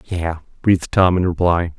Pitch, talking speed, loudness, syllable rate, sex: 85 Hz, 170 wpm, -18 LUFS, 4.9 syllables/s, male